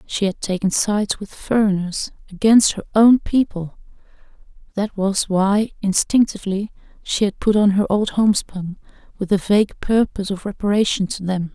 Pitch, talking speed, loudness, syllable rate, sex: 200 Hz, 150 wpm, -19 LUFS, 5.0 syllables/s, female